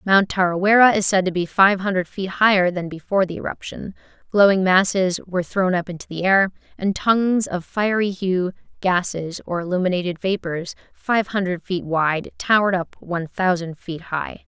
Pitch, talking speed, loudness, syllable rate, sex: 185 Hz, 170 wpm, -20 LUFS, 5.1 syllables/s, female